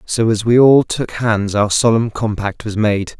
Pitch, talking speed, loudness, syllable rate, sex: 110 Hz, 205 wpm, -15 LUFS, 4.2 syllables/s, male